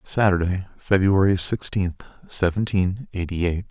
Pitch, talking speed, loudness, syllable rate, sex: 95 Hz, 95 wpm, -22 LUFS, 4.4 syllables/s, male